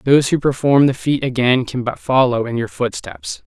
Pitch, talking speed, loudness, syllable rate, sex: 130 Hz, 205 wpm, -17 LUFS, 5.0 syllables/s, male